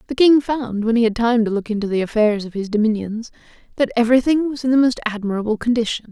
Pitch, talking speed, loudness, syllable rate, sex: 230 Hz, 235 wpm, -18 LUFS, 6.5 syllables/s, female